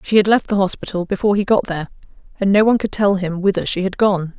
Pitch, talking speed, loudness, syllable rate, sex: 195 Hz, 260 wpm, -17 LUFS, 6.8 syllables/s, female